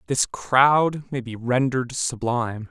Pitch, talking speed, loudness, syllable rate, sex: 130 Hz, 135 wpm, -22 LUFS, 4.1 syllables/s, male